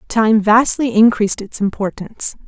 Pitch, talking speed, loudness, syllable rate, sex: 215 Hz, 120 wpm, -15 LUFS, 5.0 syllables/s, female